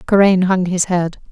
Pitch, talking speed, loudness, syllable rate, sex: 185 Hz, 180 wpm, -15 LUFS, 4.6 syllables/s, female